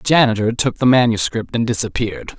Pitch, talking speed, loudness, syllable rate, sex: 115 Hz, 175 wpm, -17 LUFS, 6.1 syllables/s, male